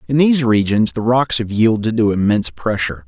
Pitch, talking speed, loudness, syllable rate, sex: 115 Hz, 195 wpm, -16 LUFS, 5.9 syllables/s, male